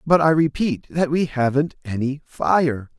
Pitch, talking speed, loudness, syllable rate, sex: 145 Hz, 160 wpm, -21 LUFS, 4.1 syllables/s, male